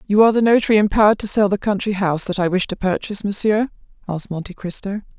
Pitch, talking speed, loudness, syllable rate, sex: 200 Hz, 220 wpm, -19 LUFS, 7.3 syllables/s, female